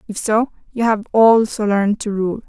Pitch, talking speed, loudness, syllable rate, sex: 215 Hz, 195 wpm, -17 LUFS, 4.9 syllables/s, female